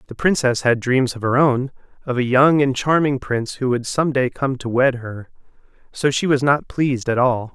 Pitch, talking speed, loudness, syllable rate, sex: 130 Hz, 225 wpm, -19 LUFS, 5.0 syllables/s, male